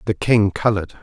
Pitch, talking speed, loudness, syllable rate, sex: 100 Hz, 175 wpm, -18 LUFS, 6.1 syllables/s, male